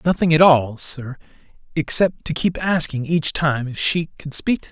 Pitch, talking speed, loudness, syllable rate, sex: 150 Hz, 190 wpm, -19 LUFS, 4.8 syllables/s, male